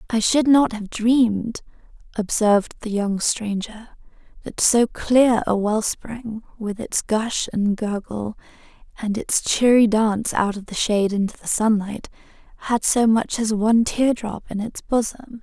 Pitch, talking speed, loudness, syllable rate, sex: 220 Hz, 160 wpm, -20 LUFS, 4.2 syllables/s, female